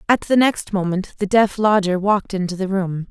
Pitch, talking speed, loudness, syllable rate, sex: 195 Hz, 210 wpm, -19 LUFS, 5.2 syllables/s, female